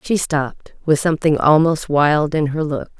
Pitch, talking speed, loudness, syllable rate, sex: 155 Hz, 180 wpm, -17 LUFS, 4.7 syllables/s, female